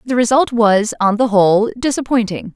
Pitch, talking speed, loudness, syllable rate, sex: 225 Hz, 165 wpm, -15 LUFS, 5.1 syllables/s, female